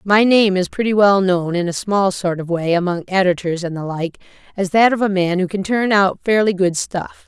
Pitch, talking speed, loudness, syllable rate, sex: 190 Hz, 240 wpm, -17 LUFS, 5.1 syllables/s, female